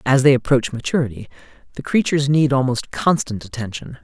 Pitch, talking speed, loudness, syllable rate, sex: 135 Hz, 150 wpm, -19 LUFS, 5.8 syllables/s, male